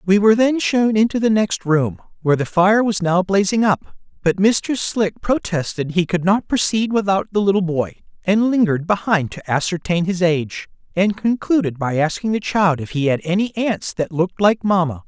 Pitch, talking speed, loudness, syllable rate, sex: 190 Hz, 195 wpm, -18 LUFS, 5.0 syllables/s, male